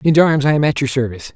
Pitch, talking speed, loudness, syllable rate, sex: 140 Hz, 265 wpm, -16 LUFS, 7.6 syllables/s, male